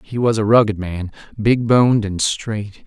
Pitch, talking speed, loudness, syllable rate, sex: 110 Hz, 190 wpm, -17 LUFS, 4.4 syllables/s, male